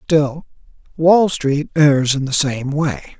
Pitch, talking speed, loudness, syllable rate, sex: 145 Hz, 150 wpm, -16 LUFS, 3.1 syllables/s, male